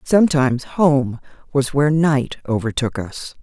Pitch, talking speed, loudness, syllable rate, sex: 140 Hz, 125 wpm, -18 LUFS, 4.6 syllables/s, female